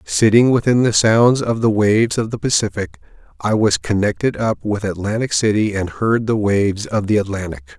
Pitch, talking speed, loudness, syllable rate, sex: 110 Hz, 185 wpm, -17 LUFS, 5.2 syllables/s, male